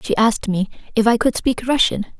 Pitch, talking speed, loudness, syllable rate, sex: 225 Hz, 220 wpm, -18 LUFS, 6.0 syllables/s, female